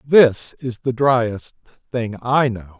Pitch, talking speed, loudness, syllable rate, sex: 120 Hz, 150 wpm, -19 LUFS, 2.8 syllables/s, male